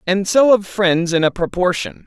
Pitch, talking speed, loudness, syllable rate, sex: 185 Hz, 205 wpm, -16 LUFS, 4.7 syllables/s, male